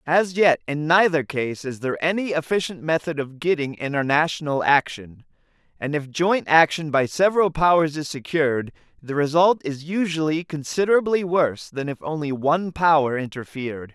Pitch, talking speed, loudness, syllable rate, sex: 155 Hz, 150 wpm, -21 LUFS, 5.2 syllables/s, male